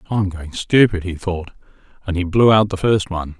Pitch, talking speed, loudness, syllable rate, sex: 95 Hz, 210 wpm, -18 LUFS, 5.2 syllables/s, male